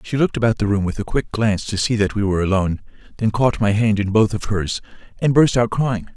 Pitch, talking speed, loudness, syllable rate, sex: 105 Hz, 265 wpm, -19 LUFS, 6.3 syllables/s, male